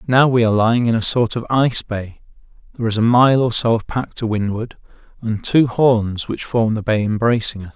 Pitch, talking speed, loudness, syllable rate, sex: 115 Hz, 215 wpm, -17 LUFS, 5.5 syllables/s, male